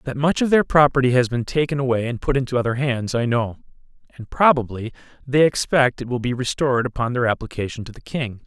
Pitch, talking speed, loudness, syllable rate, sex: 125 Hz, 215 wpm, -20 LUFS, 6.1 syllables/s, male